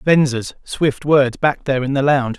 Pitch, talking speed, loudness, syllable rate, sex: 135 Hz, 200 wpm, -17 LUFS, 5.0 syllables/s, male